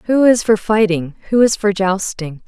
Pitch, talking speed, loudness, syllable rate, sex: 200 Hz, 195 wpm, -15 LUFS, 4.7 syllables/s, female